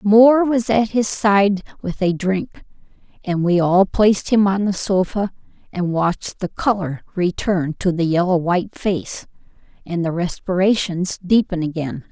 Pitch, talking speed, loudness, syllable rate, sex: 190 Hz, 155 wpm, -18 LUFS, 4.4 syllables/s, female